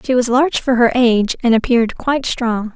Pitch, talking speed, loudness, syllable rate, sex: 240 Hz, 220 wpm, -15 LUFS, 5.9 syllables/s, female